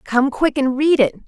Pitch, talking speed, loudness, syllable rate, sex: 275 Hz, 235 wpm, -17 LUFS, 4.7 syllables/s, female